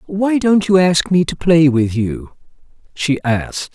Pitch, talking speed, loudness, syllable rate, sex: 160 Hz, 175 wpm, -15 LUFS, 4.1 syllables/s, male